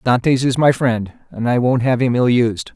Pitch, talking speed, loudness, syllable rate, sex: 125 Hz, 240 wpm, -16 LUFS, 4.6 syllables/s, male